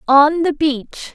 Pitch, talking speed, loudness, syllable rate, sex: 295 Hz, 160 wpm, -16 LUFS, 3.0 syllables/s, female